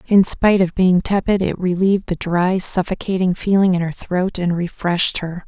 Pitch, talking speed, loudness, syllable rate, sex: 185 Hz, 185 wpm, -18 LUFS, 5.1 syllables/s, female